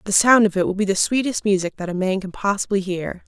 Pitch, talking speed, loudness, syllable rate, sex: 195 Hz, 275 wpm, -20 LUFS, 6.2 syllables/s, female